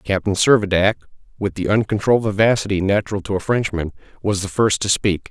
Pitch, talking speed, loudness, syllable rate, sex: 100 Hz, 170 wpm, -19 LUFS, 6.1 syllables/s, male